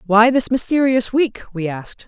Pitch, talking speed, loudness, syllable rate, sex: 230 Hz, 175 wpm, -17 LUFS, 5.0 syllables/s, female